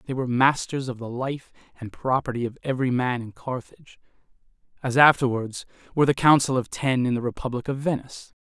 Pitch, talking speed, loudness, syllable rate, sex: 130 Hz, 180 wpm, -24 LUFS, 6.1 syllables/s, male